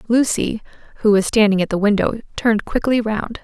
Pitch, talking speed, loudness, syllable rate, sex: 215 Hz, 175 wpm, -18 LUFS, 5.5 syllables/s, female